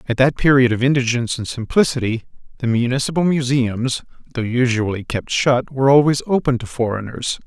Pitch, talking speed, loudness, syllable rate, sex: 125 Hz, 155 wpm, -18 LUFS, 5.8 syllables/s, male